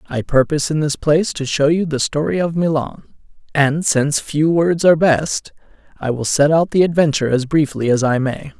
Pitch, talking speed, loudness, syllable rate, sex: 150 Hz, 190 wpm, -17 LUFS, 5.3 syllables/s, male